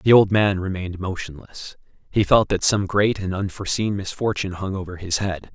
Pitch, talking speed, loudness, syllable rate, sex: 95 Hz, 185 wpm, -22 LUFS, 5.4 syllables/s, male